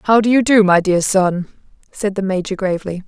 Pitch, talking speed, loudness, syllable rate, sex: 195 Hz, 215 wpm, -16 LUFS, 5.4 syllables/s, female